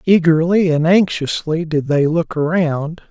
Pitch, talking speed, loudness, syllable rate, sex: 165 Hz, 135 wpm, -16 LUFS, 4.1 syllables/s, male